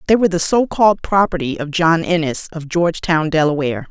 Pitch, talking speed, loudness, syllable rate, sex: 170 Hz, 185 wpm, -16 LUFS, 6.0 syllables/s, female